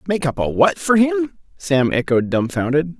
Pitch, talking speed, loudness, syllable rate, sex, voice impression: 160 Hz, 180 wpm, -18 LUFS, 4.6 syllables/s, male, very masculine, very middle-aged, very thick, tensed, very powerful, bright, soft, muffled, fluent, raspy, very cool, intellectual, refreshing, sincere, very calm, very mature, very friendly, reassuring, very unique, elegant, wild, sweet, lively, very kind, slightly intense